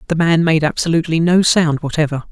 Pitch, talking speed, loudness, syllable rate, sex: 160 Hz, 180 wpm, -15 LUFS, 6.3 syllables/s, male